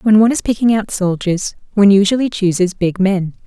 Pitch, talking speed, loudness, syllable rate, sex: 200 Hz, 190 wpm, -15 LUFS, 5.8 syllables/s, female